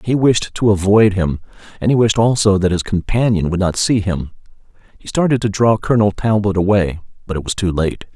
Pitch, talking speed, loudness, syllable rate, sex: 100 Hz, 205 wpm, -16 LUFS, 5.5 syllables/s, male